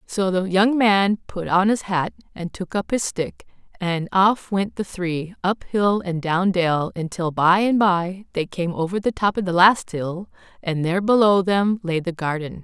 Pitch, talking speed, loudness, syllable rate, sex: 185 Hz, 205 wpm, -21 LUFS, 4.2 syllables/s, female